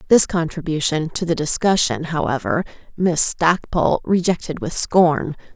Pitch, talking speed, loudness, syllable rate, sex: 160 Hz, 120 wpm, -19 LUFS, 4.5 syllables/s, female